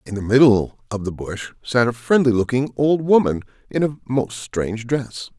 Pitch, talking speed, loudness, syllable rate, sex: 120 Hz, 190 wpm, -20 LUFS, 5.0 syllables/s, male